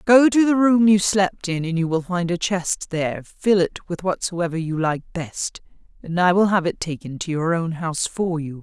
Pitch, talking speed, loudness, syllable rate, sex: 175 Hz, 230 wpm, -21 LUFS, 4.7 syllables/s, female